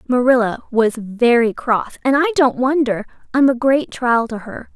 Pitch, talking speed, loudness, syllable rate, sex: 250 Hz, 175 wpm, -17 LUFS, 4.5 syllables/s, female